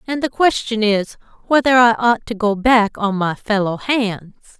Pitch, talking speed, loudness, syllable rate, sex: 220 Hz, 185 wpm, -16 LUFS, 4.4 syllables/s, female